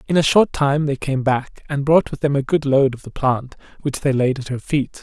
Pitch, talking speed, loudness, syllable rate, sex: 140 Hz, 275 wpm, -19 LUFS, 5.0 syllables/s, male